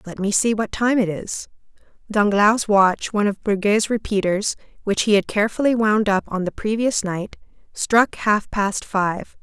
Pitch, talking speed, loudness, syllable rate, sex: 210 Hz, 170 wpm, -20 LUFS, 4.5 syllables/s, female